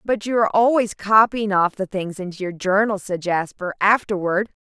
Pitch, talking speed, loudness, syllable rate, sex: 200 Hz, 180 wpm, -20 LUFS, 5.1 syllables/s, female